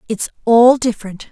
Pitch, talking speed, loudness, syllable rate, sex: 225 Hz, 135 wpm, -14 LUFS, 5.3 syllables/s, female